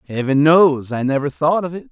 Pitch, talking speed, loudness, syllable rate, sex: 150 Hz, 220 wpm, -16 LUFS, 5.4 syllables/s, male